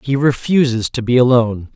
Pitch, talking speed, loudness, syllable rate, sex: 125 Hz, 170 wpm, -15 LUFS, 5.6 syllables/s, male